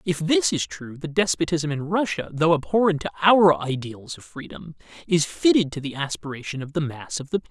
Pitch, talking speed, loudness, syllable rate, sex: 160 Hz, 210 wpm, -22 LUFS, 5.5 syllables/s, male